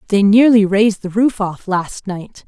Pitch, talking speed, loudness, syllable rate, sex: 205 Hz, 195 wpm, -14 LUFS, 4.4 syllables/s, female